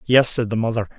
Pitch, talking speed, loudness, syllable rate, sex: 115 Hz, 245 wpm, -19 LUFS, 6.1 syllables/s, male